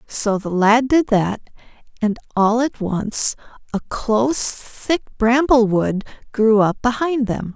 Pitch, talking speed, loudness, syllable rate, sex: 230 Hz, 145 wpm, -18 LUFS, 3.6 syllables/s, female